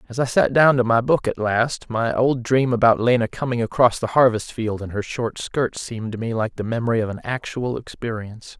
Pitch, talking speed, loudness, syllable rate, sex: 120 Hz, 230 wpm, -21 LUFS, 5.4 syllables/s, male